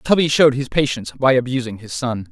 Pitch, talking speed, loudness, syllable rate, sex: 130 Hz, 210 wpm, -18 LUFS, 6.2 syllables/s, male